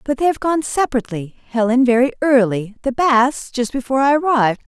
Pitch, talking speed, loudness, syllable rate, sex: 255 Hz, 165 wpm, -17 LUFS, 5.9 syllables/s, female